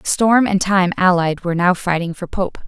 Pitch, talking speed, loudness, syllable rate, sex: 185 Hz, 225 wpm, -17 LUFS, 5.1 syllables/s, female